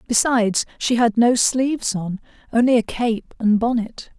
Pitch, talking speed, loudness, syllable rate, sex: 230 Hz, 145 wpm, -19 LUFS, 4.7 syllables/s, female